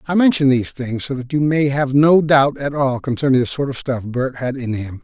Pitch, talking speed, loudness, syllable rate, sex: 135 Hz, 260 wpm, -17 LUFS, 5.3 syllables/s, male